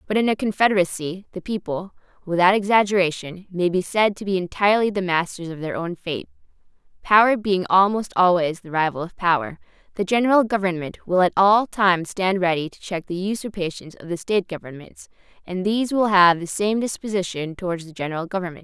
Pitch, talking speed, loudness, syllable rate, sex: 185 Hz, 180 wpm, -21 LUFS, 5.8 syllables/s, female